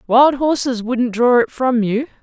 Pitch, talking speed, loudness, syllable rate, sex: 250 Hz, 190 wpm, -16 LUFS, 4.1 syllables/s, female